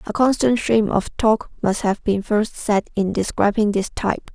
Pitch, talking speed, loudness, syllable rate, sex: 210 Hz, 195 wpm, -20 LUFS, 4.4 syllables/s, female